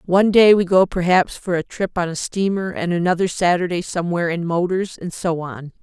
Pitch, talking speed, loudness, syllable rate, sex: 180 Hz, 205 wpm, -19 LUFS, 5.6 syllables/s, female